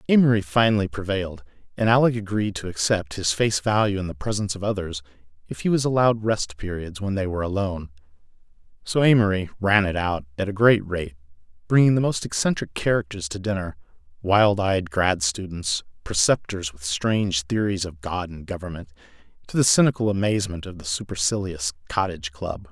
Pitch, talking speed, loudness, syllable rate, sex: 95 Hz, 165 wpm, -23 LUFS, 5.7 syllables/s, male